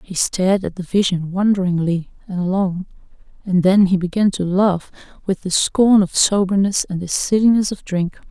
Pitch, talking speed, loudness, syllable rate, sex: 190 Hz, 175 wpm, -18 LUFS, 4.8 syllables/s, female